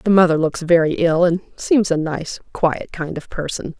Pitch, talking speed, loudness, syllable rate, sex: 170 Hz, 205 wpm, -18 LUFS, 4.6 syllables/s, female